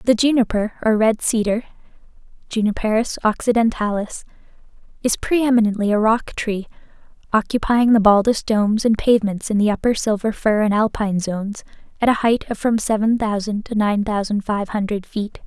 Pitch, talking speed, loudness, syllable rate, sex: 215 Hz, 150 wpm, -19 LUFS, 4.8 syllables/s, female